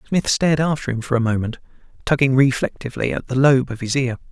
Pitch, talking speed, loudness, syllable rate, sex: 130 Hz, 210 wpm, -19 LUFS, 6.4 syllables/s, male